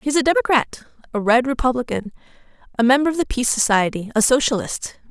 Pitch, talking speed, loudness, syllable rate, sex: 245 Hz, 165 wpm, -19 LUFS, 6.4 syllables/s, female